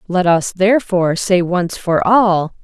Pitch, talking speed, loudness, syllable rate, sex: 185 Hz, 160 wpm, -15 LUFS, 4.2 syllables/s, female